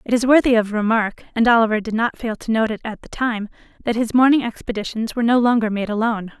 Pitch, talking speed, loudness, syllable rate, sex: 225 Hz, 235 wpm, -19 LUFS, 6.4 syllables/s, female